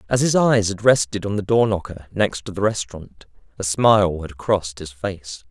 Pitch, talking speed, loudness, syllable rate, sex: 100 Hz, 195 wpm, -20 LUFS, 5.1 syllables/s, male